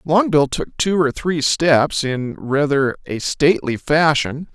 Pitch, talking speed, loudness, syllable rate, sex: 150 Hz, 145 wpm, -18 LUFS, 3.7 syllables/s, male